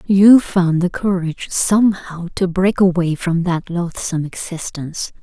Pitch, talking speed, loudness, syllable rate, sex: 180 Hz, 140 wpm, -17 LUFS, 4.4 syllables/s, female